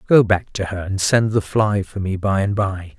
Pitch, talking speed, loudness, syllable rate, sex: 100 Hz, 260 wpm, -19 LUFS, 4.6 syllables/s, male